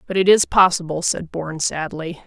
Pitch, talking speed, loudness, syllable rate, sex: 170 Hz, 185 wpm, -18 LUFS, 5.2 syllables/s, female